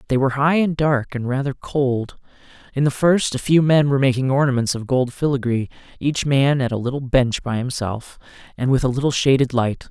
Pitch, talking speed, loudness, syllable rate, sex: 135 Hz, 205 wpm, -19 LUFS, 5.5 syllables/s, male